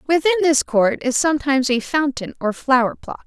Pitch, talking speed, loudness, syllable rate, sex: 280 Hz, 185 wpm, -18 LUFS, 5.5 syllables/s, female